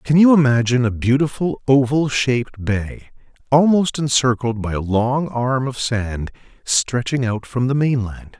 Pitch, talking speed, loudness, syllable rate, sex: 125 Hz, 150 wpm, -18 LUFS, 4.4 syllables/s, male